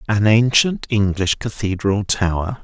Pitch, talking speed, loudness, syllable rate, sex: 105 Hz, 115 wpm, -18 LUFS, 4.1 syllables/s, male